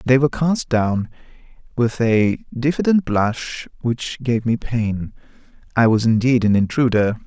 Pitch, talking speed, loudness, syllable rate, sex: 120 Hz, 140 wpm, -19 LUFS, 4.1 syllables/s, male